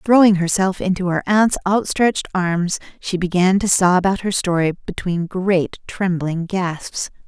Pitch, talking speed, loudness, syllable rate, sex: 185 Hz, 150 wpm, -18 LUFS, 4.1 syllables/s, female